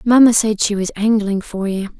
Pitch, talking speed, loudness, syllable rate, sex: 210 Hz, 210 wpm, -16 LUFS, 4.8 syllables/s, female